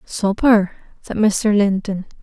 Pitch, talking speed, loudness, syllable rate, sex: 205 Hz, 110 wpm, -17 LUFS, 3.5 syllables/s, female